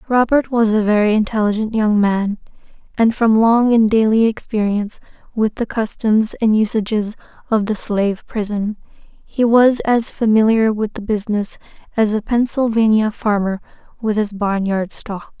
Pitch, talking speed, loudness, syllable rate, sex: 215 Hz, 150 wpm, -17 LUFS, 4.6 syllables/s, female